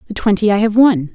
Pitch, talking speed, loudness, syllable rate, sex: 210 Hz, 260 wpm, -13 LUFS, 6.2 syllables/s, female